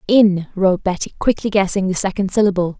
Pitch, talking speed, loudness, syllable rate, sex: 195 Hz, 170 wpm, -17 LUFS, 5.9 syllables/s, female